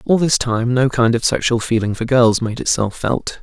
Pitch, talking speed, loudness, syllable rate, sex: 120 Hz, 230 wpm, -17 LUFS, 4.8 syllables/s, male